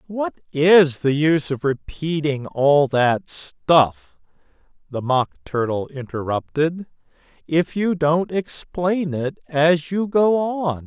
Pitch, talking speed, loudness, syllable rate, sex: 160 Hz, 120 wpm, -20 LUFS, 3.3 syllables/s, male